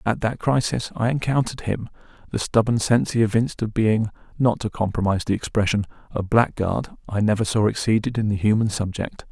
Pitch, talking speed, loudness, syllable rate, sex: 110 Hz, 165 wpm, -22 LUFS, 5.9 syllables/s, male